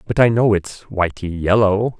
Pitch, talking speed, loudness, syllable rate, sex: 100 Hz, 180 wpm, -17 LUFS, 4.4 syllables/s, male